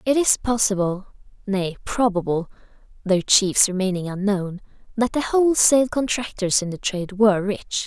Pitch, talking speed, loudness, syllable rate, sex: 205 Hz, 135 wpm, -21 LUFS, 4.4 syllables/s, female